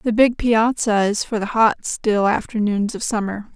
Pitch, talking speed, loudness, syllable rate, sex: 215 Hz, 185 wpm, -19 LUFS, 4.4 syllables/s, female